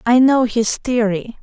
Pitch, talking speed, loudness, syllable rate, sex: 235 Hz, 170 wpm, -16 LUFS, 3.9 syllables/s, female